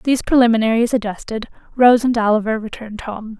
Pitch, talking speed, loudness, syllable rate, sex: 225 Hz, 140 wpm, -16 LUFS, 6.2 syllables/s, female